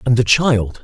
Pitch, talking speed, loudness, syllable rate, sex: 115 Hz, 215 wpm, -14 LUFS, 4.2 syllables/s, male